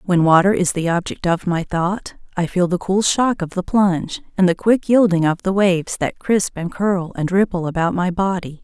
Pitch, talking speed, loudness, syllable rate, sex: 180 Hz, 220 wpm, -18 LUFS, 5.0 syllables/s, female